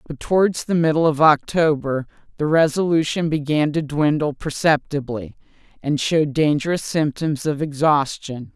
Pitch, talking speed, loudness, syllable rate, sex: 150 Hz, 125 wpm, -20 LUFS, 4.7 syllables/s, female